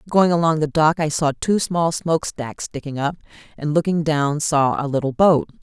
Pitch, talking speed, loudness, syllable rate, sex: 155 Hz, 190 wpm, -20 LUFS, 4.9 syllables/s, female